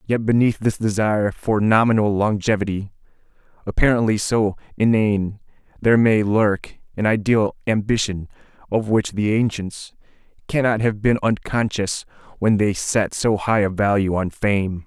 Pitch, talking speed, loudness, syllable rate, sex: 105 Hz, 135 wpm, -20 LUFS, 4.7 syllables/s, male